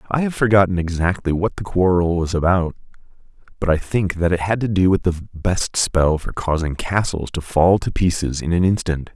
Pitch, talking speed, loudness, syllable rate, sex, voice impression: 90 Hz, 205 wpm, -19 LUFS, 5.1 syllables/s, male, very masculine, adult-like, slightly thick, cool, slightly intellectual, wild